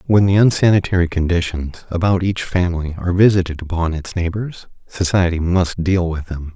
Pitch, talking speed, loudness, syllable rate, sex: 90 Hz, 155 wpm, -17 LUFS, 5.4 syllables/s, male